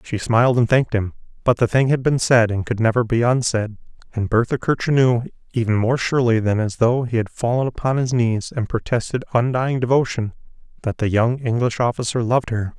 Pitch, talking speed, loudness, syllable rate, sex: 120 Hz, 200 wpm, -19 LUFS, 5.7 syllables/s, male